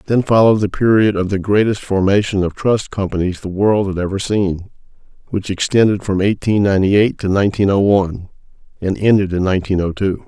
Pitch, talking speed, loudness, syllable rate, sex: 100 Hz, 185 wpm, -16 LUFS, 5.8 syllables/s, male